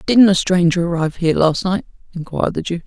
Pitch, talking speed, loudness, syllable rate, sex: 170 Hz, 210 wpm, -17 LUFS, 6.6 syllables/s, male